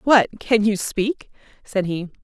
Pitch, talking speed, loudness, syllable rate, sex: 210 Hz, 160 wpm, -21 LUFS, 3.8 syllables/s, female